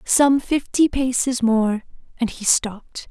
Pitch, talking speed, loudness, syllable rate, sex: 245 Hz, 135 wpm, -20 LUFS, 3.7 syllables/s, female